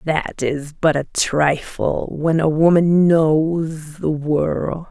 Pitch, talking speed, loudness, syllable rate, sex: 155 Hz, 135 wpm, -18 LUFS, 2.8 syllables/s, female